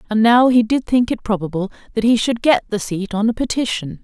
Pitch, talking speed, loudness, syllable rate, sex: 220 Hz, 240 wpm, -17 LUFS, 5.7 syllables/s, female